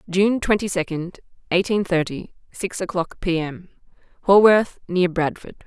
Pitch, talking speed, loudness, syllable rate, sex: 180 Hz, 115 wpm, -21 LUFS, 4.2 syllables/s, female